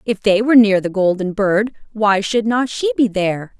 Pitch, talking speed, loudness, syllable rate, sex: 215 Hz, 215 wpm, -16 LUFS, 5.0 syllables/s, female